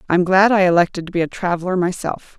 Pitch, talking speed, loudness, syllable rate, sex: 180 Hz, 225 wpm, -17 LUFS, 6.3 syllables/s, female